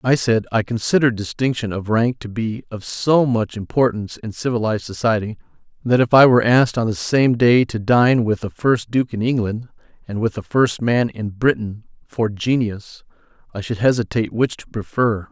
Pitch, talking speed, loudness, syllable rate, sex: 115 Hz, 190 wpm, -19 LUFS, 5.2 syllables/s, male